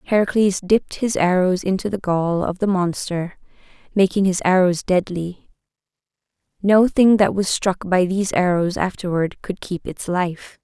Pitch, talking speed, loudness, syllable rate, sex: 185 Hz, 150 wpm, -19 LUFS, 4.6 syllables/s, female